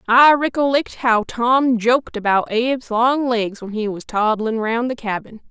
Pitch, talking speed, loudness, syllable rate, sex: 235 Hz, 175 wpm, -18 LUFS, 4.4 syllables/s, female